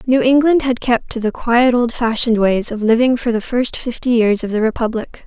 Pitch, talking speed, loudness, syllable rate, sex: 235 Hz, 215 wpm, -16 LUFS, 5.2 syllables/s, female